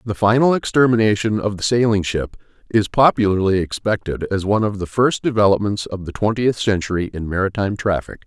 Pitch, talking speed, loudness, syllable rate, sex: 105 Hz, 165 wpm, -18 LUFS, 5.8 syllables/s, male